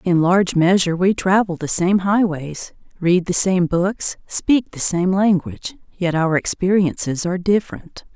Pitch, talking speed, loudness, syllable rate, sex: 180 Hz, 155 wpm, -18 LUFS, 4.6 syllables/s, female